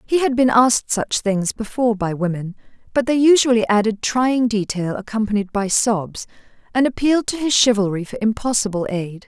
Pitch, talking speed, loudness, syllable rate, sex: 225 Hz, 170 wpm, -18 LUFS, 5.4 syllables/s, female